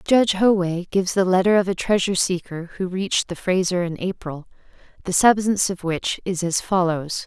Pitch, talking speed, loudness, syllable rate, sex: 185 Hz, 180 wpm, -21 LUFS, 5.5 syllables/s, female